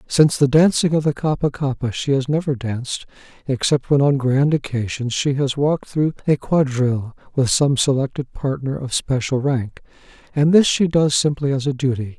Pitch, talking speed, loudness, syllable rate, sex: 140 Hz, 180 wpm, -19 LUFS, 5.1 syllables/s, male